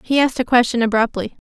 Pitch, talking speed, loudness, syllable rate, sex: 240 Hz, 205 wpm, -17 LUFS, 7.0 syllables/s, female